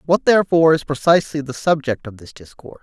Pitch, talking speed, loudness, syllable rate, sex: 150 Hz, 190 wpm, -17 LUFS, 6.7 syllables/s, male